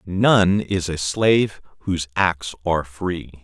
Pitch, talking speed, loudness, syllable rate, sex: 90 Hz, 140 wpm, -20 LUFS, 4.0 syllables/s, male